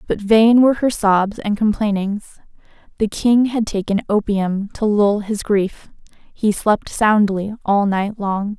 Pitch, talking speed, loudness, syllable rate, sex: 210 Hz, 155 wpm, -17 LUFS, 3.9 syllables/s, female